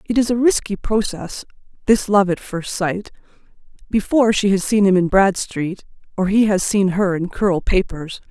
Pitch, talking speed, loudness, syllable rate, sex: 200 Hz, 180 wpm, -18 LUFS, 4.7 syllables/s, female